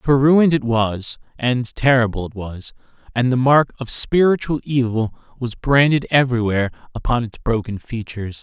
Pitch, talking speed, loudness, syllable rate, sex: 125 Hz, 150 wpm, -18 LUFS, 4.9 syllables/s, male